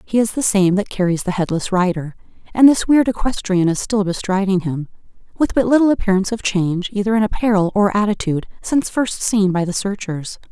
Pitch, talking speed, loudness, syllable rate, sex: 200 Hz, 195 wpm, -18 LUFS, 5.8 syllables/s, female